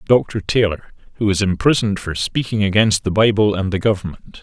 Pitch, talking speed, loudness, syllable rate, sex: 100 Hz, 175 wpm, -18 LUFS, 5.4 syllables/s, male